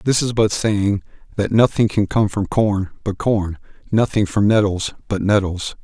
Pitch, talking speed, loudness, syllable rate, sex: 105 Hz, 175 wpm, -19 LUFS, 4.3 syllables/s, male